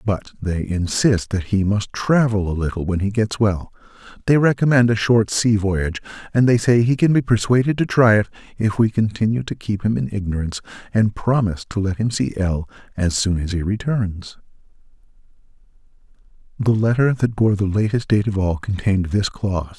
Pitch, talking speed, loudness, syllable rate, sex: 105 Hz, 180 wpm, -19 LUFS, 5.2 syllables/s, male